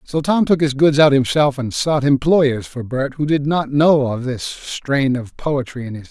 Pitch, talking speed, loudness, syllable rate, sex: 140 Hz, 235 wpm, -17 LUFS, 4.8 syllables/s, male